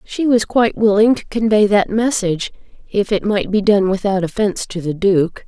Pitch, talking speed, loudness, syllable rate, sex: 205 Hz, 185 wpm, -16 LUFS, 5.3 syllables/s, female